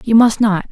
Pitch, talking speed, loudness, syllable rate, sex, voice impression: 215 Hz, 250 wpm, -13 LUFS, 4.9 syllables/s, female, feminine, adult-like, soft, slightly sincere, calm, friendly, reassuring, kind